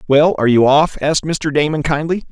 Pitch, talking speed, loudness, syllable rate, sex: 150 Hz, 205 wpm, -15 LUFS, 5.8 syllables/s, male